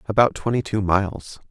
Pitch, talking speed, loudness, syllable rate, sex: 100 Hz, 160 wpm, -21 LUFS, 5.5 syllables/s, male